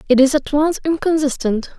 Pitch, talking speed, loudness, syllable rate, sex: 285 Hz, 170 wpm, -17 LUFS, 5.4 syllables/s, female